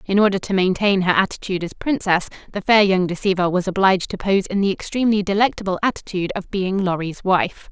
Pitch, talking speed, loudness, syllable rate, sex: 190 Hz, 195 wpm, -19 LUFS, 6.2 syllables/s, female